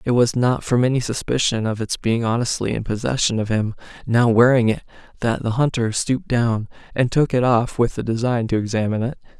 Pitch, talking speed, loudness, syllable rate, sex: 120 Hz, 205 wpm, -20 LUFS, 5.6 syllables/s, male